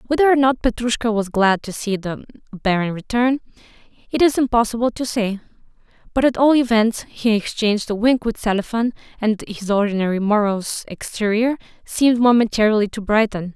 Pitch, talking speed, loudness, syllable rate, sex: 220 Hz, 155 wpm, -19 LUFS, 5.7 syllables/s, female